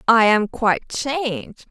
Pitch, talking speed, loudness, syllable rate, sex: 230 Hz, 140 wpm, -19 LUFS, 4.0 syllables/s, female